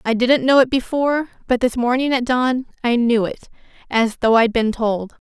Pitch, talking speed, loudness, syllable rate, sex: 245 Hz, 195 wpm, -18 LUFS, 5.0 syllables/s, female